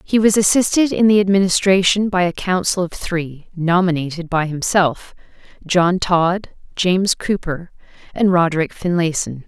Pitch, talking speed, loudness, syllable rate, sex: 180 Hz, 125 wpm, -17 LUFS, 4.7 syllables/s, female